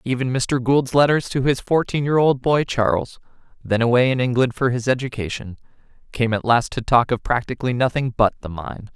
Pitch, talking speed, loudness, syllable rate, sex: 125 Hz, 195 wpm, -20 LUFS, 5.4 syllables/s, male